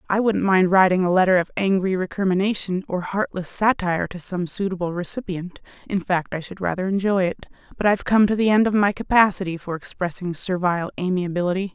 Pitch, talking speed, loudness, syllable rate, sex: 185 Hz, 185 wpm, -21 LUFS, 5.9 syllables/s, female